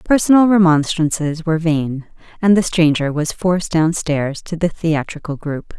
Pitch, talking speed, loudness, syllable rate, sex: 165 Hz, 155 wpm, -17 LUFS, 4.7 syllables/s, female